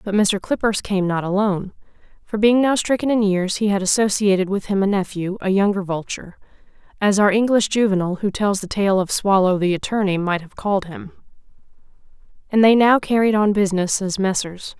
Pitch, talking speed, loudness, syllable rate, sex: 200 Hz, 185 wpm, -19 LUFS, 4.4 syllables/s, female